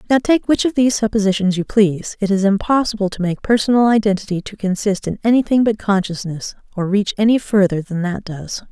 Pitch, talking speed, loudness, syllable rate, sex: 205 Hz, 195 wpm, -17 LUFS, 5.9 syllables/s, female